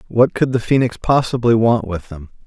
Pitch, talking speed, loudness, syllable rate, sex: 115 Hz, 195 wpm, -17 LUFS, 5.1 syllables/s, male